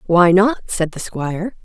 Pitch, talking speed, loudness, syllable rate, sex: 185 Hz, 185 wpm, -17 LUFS, 4.4 syllables/s, female